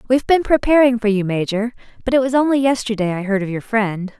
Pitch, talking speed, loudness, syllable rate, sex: 230 Hz, 230 wpm, -17 LUFS, 6.4 syllables/s, female